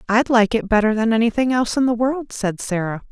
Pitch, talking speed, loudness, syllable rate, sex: 225 Hz, 230 wpm, -19 LUFS, 5.9 syllables/s, female